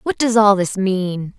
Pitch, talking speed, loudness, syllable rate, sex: 200 Hz, 215 wpm, -17 LUFS, 3.9 syllables/s, female